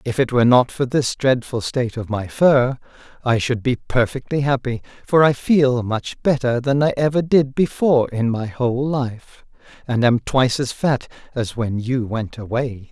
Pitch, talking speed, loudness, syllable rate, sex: 125 Hz, 185 wpm, -19 LUFS, 4.7 syllables/s, male